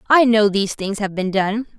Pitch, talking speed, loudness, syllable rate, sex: 210 Hz, 235 wpm, -18 LUFS, 5.3 syllables/s, female